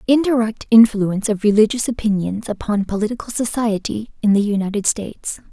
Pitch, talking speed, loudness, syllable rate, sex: 215 Hz, 130 wpm, -18 LUFS, 5.6 syllables/s, female